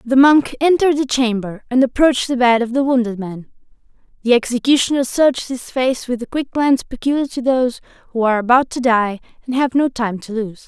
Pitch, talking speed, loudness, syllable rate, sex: 250 Hz, 200 wpm, -17 LUFS, 5.8 syllables/s, female